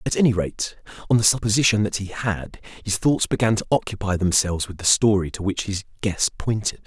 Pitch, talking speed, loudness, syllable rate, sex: 100 Hz, 200 wpm, -22 LUFS, 5.8 syllables/s, male